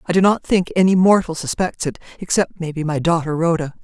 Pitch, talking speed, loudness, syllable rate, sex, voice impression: 170 Hz, 205 wpm, -18 LUFS, 5.7 syllables/s, female, very feminine, adult-like, slightly thin, tensed, powerful, slightly dark, very hard, very clear, very fluent, cool, very intellectual, refreshing, sincere, slightly calm, friendly, very reassuring, very unique, slightly elegant, wild, sweet, very lively, strict, intense, slightly sharp